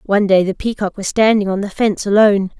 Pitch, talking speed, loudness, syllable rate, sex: 200 Hz, 230 wpm, -15 LUFS, 6.6 syllables/s, female